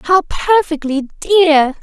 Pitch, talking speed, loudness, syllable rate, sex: 325 Hz, 100 wpm, -14 LUFS, 3.3 syllables/s, female